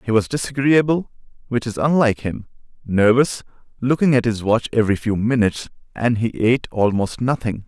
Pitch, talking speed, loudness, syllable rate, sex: 115 Hz, 155 wpm, -19 LUFS, 5.6 syllables/s, male